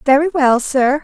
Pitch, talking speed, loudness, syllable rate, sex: 280 Hz, 175 wpm, -14 LUFS, 4.4 syllables/s, female